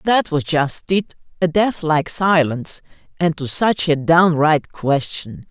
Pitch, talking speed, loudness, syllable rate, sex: 160 Hz, 140 wpm, -18 LUFS, 4.0 syllables/s, female